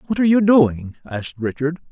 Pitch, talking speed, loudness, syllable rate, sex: 155 Hz, 190 wpm, -17 LUFS, 5.7 syllables/s, male